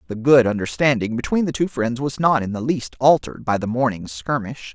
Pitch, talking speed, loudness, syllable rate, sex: 125 Hz, 215 wpm, -20 LUFS, 5.5 syllables/s, male